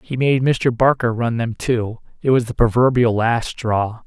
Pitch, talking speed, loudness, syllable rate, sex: 120 Hz, 175 wpm, -18 LUFS, 4.2 syllables/s, male